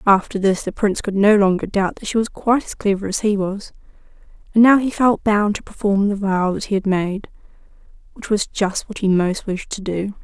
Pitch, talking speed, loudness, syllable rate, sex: 200 Hz, 230 wpm, -19 LUFS, 5.3 syllables/s, female